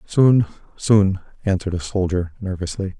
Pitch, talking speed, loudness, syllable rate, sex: 95 Hz, 120 wpm, -20 LUFS, 4.9 syllables/s, male